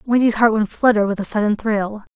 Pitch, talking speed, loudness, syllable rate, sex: 215 Hz, 225 wpm, -18 LUFS, 5.6 syllables/s, female